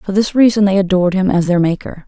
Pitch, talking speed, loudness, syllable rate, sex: 190 Hz, 260 wpm, -14 LUFS, 6.4 syllables/s, female